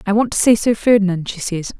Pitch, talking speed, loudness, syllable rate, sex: 205 Hz, 270 wpm, -16 LUFS, 6.0 syllables/s, female